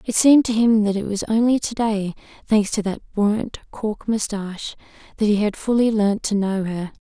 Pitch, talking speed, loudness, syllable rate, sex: 210 Hz, 195 wpm, -20 LUFS, 5.2 syllables/s, female